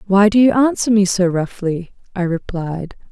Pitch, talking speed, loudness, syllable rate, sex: 195 Hz, 175 wpm, -16 LUFS, 4.6 syllables/s, female